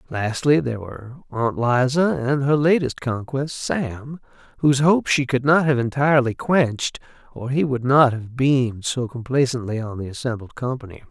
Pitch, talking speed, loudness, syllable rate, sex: 130 Hz, 160 wpm, -21 LUFS, 5.0 syllables/s, male